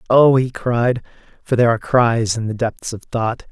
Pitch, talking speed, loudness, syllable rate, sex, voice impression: 120 Hz, 205 wpm, -18 LUFS, 4.8 syllables/s, male, very masculine, slightly old, very thick, slightly relaxed, slightly weak, slightly dark, very soft, slightly muffled, fluent, slightly cool, intellectual, slightly refreshing, sincere, very calm, very mature, very reassuring, slightly unique, elegant, slightly wild, sweet, slightly lively, very kind, slightly modest